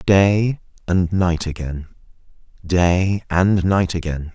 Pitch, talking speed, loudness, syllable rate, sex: 90 Hz, 110 wpm, -19 LUFS, 3.1 syllables/s, male